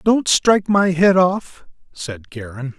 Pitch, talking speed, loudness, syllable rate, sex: 170 Hz, 150 wpm, -16 LUFS, 3.7 syllables/s, male